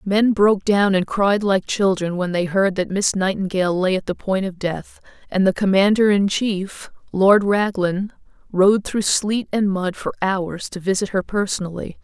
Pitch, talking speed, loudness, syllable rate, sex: 195 Hz, 185 wpm, -19 LUFS, 4.5 syllables/s, female